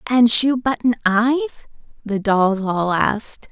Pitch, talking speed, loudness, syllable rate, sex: 225 Hz, 135 wpm, -18 LUFS, 4.0 syllables/s, female